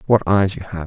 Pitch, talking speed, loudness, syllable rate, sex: 95 Hz, 280 wpm, -17 LUFS, 6.2 syllables/s, male